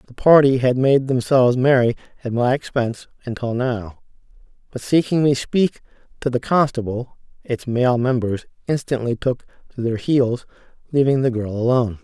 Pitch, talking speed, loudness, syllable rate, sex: 125 Hz, 150 wpm, -19 LUFS, 4.9 syllables/s, male